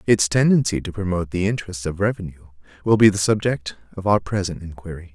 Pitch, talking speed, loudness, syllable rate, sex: 95 Hz, 185 wpm, -20 LUFS, 6.1 syllables/s, male